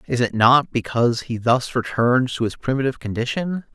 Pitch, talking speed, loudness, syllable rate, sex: 125 Hz, 175 wpm, -20 LUFS, 5.4 syllables/s, male